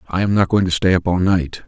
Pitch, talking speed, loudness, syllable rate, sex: 90 Hz, 325 wpm, -17 LUFS, 6.0 syllables/s, male